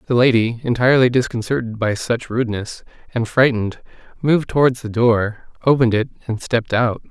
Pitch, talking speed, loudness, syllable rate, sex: 120 Hz, 150 wpm, -18 LUFS, 5.8 syllables/s, male